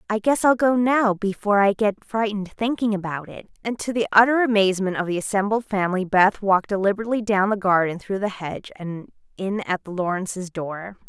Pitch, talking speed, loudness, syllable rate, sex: 200 Hz, 195 wpm, -22 LUFS, 5.9 syllables/s, female